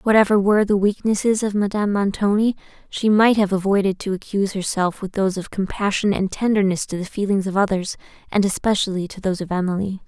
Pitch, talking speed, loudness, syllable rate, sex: 200 Hz, 185 wpm, -20 LUFS, 6.2 syllables/s, female